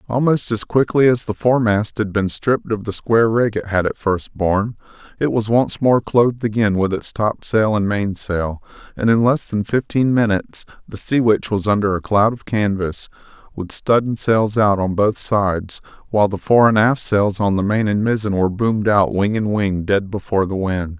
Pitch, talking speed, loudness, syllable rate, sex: 105 Hz, 205 wpm, -18 LUFS, 5.0 syllables/s, male